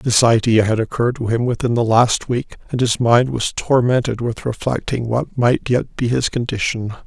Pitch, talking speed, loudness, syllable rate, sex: 120 Hz, 195 wpm, -18 LUFS, 4.9 syllables/s, male